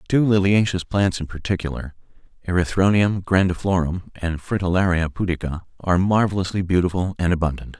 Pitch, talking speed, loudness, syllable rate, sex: 90 Hz, 115 wpm, -21 LUFS, 5.8 syllables/s, male